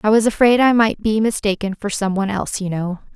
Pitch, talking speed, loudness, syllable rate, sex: 210 Hz, 230 wpm, -18 LUFS, 6.1 syllables/s, female